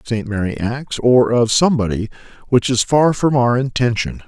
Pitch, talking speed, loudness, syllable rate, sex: 120 Hz, 170 wpm, -16 LUFS, 5.2 syllables/s, male